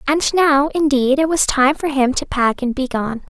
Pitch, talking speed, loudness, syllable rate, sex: 275 Hz, 215 wpm, -17 LUFS, 4.8 syllables/s, female